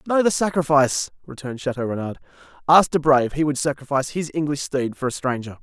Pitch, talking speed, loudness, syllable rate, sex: 140 Hz, 190 wpm, -21 LUFS, 6.6 syllables/s, male